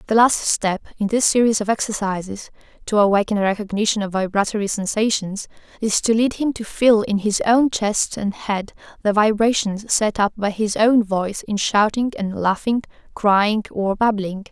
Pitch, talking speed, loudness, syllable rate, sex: 210 Hz, 175 wpm, -19 LUFS, 4.9 syllables/s, female